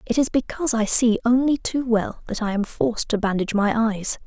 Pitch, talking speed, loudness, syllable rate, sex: 230 Hz, 225 wpm, -21 LUFS, 5.6 syllables/s, female